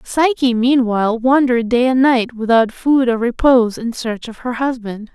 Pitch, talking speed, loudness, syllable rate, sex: 240 Hz, 175 wpm, -15 LUFS, 4.8 syllables/s, female